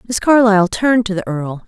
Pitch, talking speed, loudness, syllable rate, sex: 210 Hz, 215 wpm, -14 LUFS, 6.2 syllables/s, female